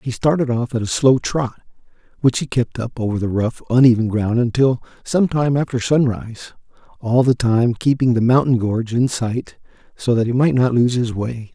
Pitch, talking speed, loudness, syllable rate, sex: 120 Hz, 195 wpm, -18 LUFS, 5.1 syllables/s, male